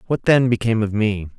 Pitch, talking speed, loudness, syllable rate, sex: 110 Hz, 215 wpm, -18 LUFS, 6.1 syllables/s, male